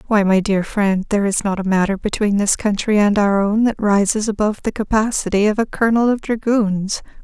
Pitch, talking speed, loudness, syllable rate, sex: 205 Hz, 205 wpm, -17 LUFS, 5.6 syllables/s, female